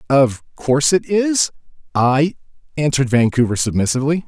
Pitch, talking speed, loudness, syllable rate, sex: 145 Hz, 110 wpm, -17 LUFS, 5.2 syllables/s, male